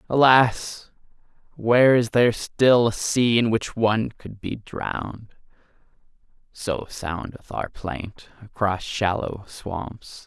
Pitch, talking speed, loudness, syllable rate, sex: 110 Hz, 110 wpm, -22 LUFS, 3.5 syllables/s, male